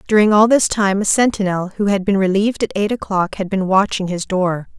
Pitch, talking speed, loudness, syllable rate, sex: 195 Hz, 225 wpm, -16 LUFS, 5.6 syllables/s, female